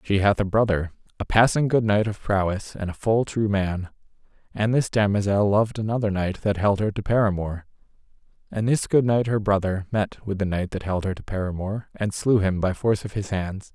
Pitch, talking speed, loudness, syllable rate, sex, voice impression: 100 Hz, 215 wpm, -23 LUFS, 5.4 syllables/s, male, masculine, adult-like, tensed, slightly bright, slightly muffled, cool, intellectual, sincere, friendly, wild, lively, kind